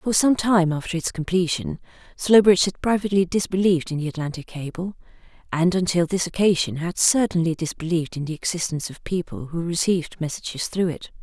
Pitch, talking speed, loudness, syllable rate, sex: 175 Hz, 165 wpm, -22 LUFS, 6.0 syllables/s, female